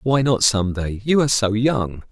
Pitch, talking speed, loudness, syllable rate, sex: 115 Hz, 200 wpm, -19 LUFS, 4.5 syllables/s, male